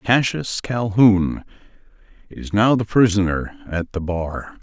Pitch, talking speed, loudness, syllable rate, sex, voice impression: 110 Hz, 115 wpm, -19 LUFS, 3.8 syllables/s, male, masculine, adult-like, tensed, powerful, slightly hard, clear, intellectual, sincere, slightly mature, friendly, reassuring, wild, lively, slightly kind, light